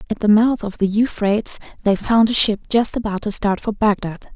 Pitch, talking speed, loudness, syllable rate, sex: 210 Hz, 220 wpm, -18 LUFS, 5.4 syllables/s, female